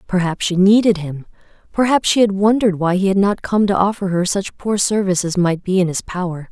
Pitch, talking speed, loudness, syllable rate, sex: 190 Hz, 220 wpm, -17 LUFS, 5.8 syllables/s, female